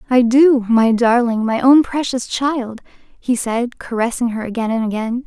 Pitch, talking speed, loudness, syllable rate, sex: 240 Hz, 170 wpm, -16 LUFS, 4.7 syllables/s, female